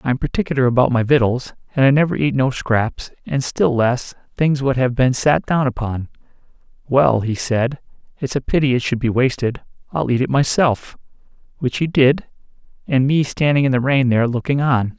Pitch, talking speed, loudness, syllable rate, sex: 130 Hz, 190 wpm, -18 LUFS, 5.2 syllables/s, male